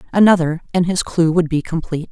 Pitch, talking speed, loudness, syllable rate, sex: 170 Hz, 200 wpm, -17 LUFS, 6.3 syllables/s, female